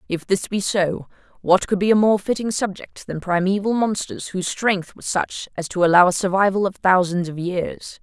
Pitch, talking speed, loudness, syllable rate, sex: 190 Hz, 200 wpm, -20 LUFS, 5.0 syllables/s, female